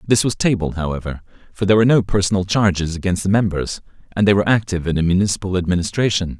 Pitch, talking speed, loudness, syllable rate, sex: 95 Hz, 195 wpm, -18 LUFS, 7.2 syllables/s, male